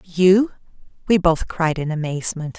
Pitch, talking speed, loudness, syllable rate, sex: 175 Hz, 140 wpm, -19 LUFS, 4.7 syllables/s, female